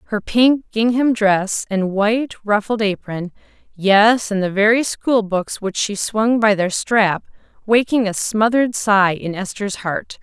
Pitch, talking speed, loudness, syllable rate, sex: 210 Hz, 155 wpm, -17 LUFS, 3.9 syllables/s, female